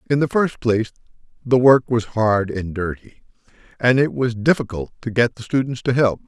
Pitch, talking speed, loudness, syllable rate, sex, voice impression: 120 Hz, 190 wpm, -19 LUFS, 5.2 syllables/s, male, very masculine, very middle-aged, very thick, very tensed, very powerful, bright, very soft, very muffled, fluent, raspy, very cool, intellectual, slightly refreshing, sincere, very calm, friendly, very reassuring, very unique, elegant, very wild, sweet, lively, kind, slightly intense